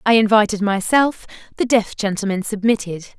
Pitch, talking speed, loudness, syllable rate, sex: 210 Hz, 115 wpm, -18 LUFS, 5.3 syllables/s, female